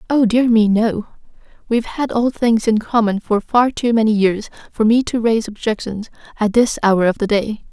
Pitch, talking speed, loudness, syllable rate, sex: 220 Hz, 200 wpm, -17 LUFS, 5.0 syllables/s, female